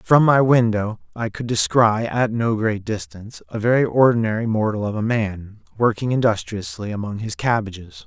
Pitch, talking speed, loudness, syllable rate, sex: 110 Hz, 165 wpm, -20 LUFS, 5.0 syllables/s, male